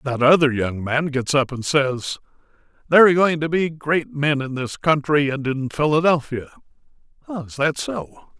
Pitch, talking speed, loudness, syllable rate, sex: 145 Hz, 170 wpm, -20 LUFS, 5.1 syllables/s, male